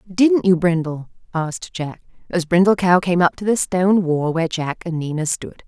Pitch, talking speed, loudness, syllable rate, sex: 175 Hz, 200 wpm, -19 LUFS, 5.0 syllables/s, female